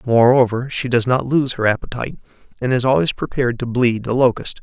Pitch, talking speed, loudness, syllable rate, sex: 125 Hz, 195 wpm, -18 LUFS, 5.8 syllables/s, male